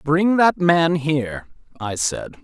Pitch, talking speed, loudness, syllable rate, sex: 155 Hz, 150 wpm, -19 LUFS, 3.6 syllables/s, male